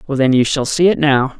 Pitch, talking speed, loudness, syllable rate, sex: 140 Hz, 300 wpm, -14 LUFS, 5.7 syllables/s, male